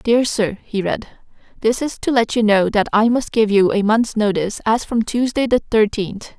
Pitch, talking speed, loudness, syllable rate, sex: 220 Hz, 215 wpm, -18 LUFS, 4.9 syllables/s, female